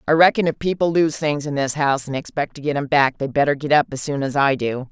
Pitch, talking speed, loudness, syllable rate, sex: 145 Hz, 295 wpm, -19 LUFS, 6.2 syllables/s, female